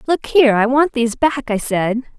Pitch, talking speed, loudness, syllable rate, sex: 250 Hz, 220 wpm, -16 LUFS, 5.2 syllables/s, female